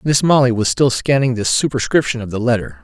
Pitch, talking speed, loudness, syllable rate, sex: 120 Hz, 210 wpm, -16 LUFS, 5.9 syllables/s, male